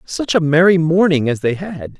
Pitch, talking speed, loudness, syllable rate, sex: 165 Hz, 210 wpm, -15 LUFS, 4.8 syllables/s, male